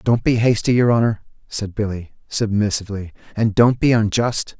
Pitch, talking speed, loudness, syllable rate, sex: 110 Hz, 155 wpm, -19 LUFS, 5.1 syllables/s, male